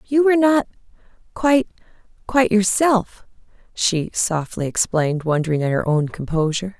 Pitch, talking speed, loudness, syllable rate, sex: 200 Hz, 105 wpm, -19 LUFS, 5.3 syllables/s, female